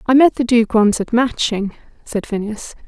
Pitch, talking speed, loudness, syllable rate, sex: 230 Hz, 190 wpm, -17 LUFS, 4.7 syllables/s, female